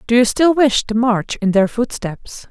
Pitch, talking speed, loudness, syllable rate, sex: 230 Hz, 215 wpm, -16 LUFS, 4.2 syllables/s, female